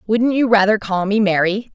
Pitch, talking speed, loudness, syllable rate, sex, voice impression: 210 Hz, 205 wpm, -16 LUFS, 5.0 syllables/s, female, very feminine, slightly gender-neutral, very adult-like, middle-aged, very thin, very tensed, very powerful, very bright, very hard, very clear, fluent, nasal, slightly cool, intellectual, very refreshing, sincere, calm, reassuring, very unique, slightly elegant, very wild, very lively, very strict, intense, very sharp